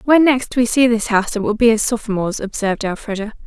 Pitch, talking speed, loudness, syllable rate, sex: 225 Hz, 225 wpm, -17 LUFS, 6.4 syllables/s, female